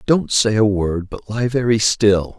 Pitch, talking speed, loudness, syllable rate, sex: 110 Hz, 200 wpm, -17 LUFS, 4.1 syllables/s, male